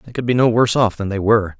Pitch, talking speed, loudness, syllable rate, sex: 110 Hz, 340 wpm, -17 LUFS, 7.6 syllables/s, male